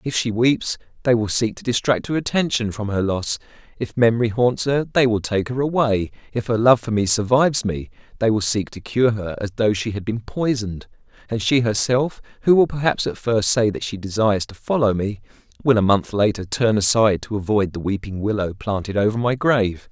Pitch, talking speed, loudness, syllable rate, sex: 110 Hz, 215 wpm, -20 LUFS, 5.4 syllables/s, male